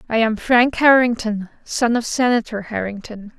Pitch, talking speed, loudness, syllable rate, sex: 230 Hz, 140 wpm, -18 LUFS, 4.6 syllables/s, female